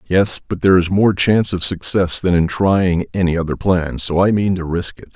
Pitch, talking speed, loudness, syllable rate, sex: 90 Hz, 235 wpm, -16 LUFS, 5.2 syllables/s, male